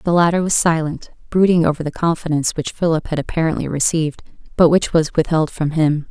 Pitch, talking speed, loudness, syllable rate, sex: 160 Hz, 185 wpm, -18 LUFS, 6.1 syllables/s, female